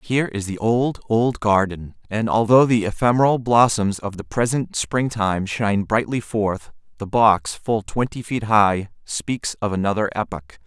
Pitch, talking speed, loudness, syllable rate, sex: 110 Hz, 160 wpm, -20 LUFS, 4.5 syllables/s, male